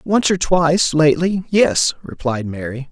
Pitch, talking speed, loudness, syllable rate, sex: 155 Hz, 125 wpm, -17 LUFS, 4.5 syllables/s, male